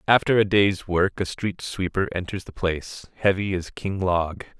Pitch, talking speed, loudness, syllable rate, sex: 95 Hz, 185 wpm, -24 LUFS, 4.5 syllables/s, male